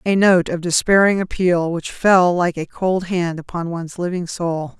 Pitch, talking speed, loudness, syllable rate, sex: 175 Hz, 190 wpm, -18 LUFS, 4.5 syllables/s, female